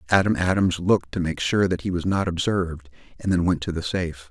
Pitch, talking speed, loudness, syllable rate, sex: 90 Hz, 235 wpm, -23 LUFS, 6.1 syllables/s, male